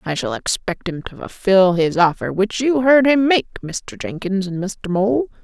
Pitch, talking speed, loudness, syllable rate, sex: 200 Hz, 200 wpm, -18 LUFS, 4.4 syllables/s, female